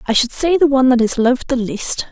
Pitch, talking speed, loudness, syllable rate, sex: 255 Hz, 285 wpm, -15 LUFS, 6.4 syllables/s, female